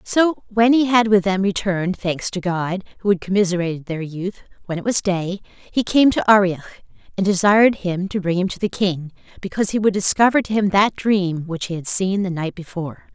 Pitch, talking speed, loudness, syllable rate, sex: 190 Hz, 215 wpm, -19 LUFS, 5.2 syllables/s, female